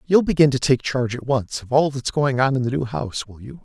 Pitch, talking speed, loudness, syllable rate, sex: 135 Hz, 295 wpm, -20 LUFS, 6.0 syllables/s, male